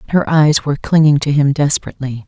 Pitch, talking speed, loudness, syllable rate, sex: 145 Hz, 185 wpm, -14 LUFS, 6.6 syllables/s, female